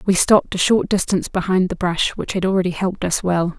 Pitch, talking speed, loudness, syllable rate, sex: 185 Hz, 235 wpm, -18 LUFS, 6.1 syllables/s, female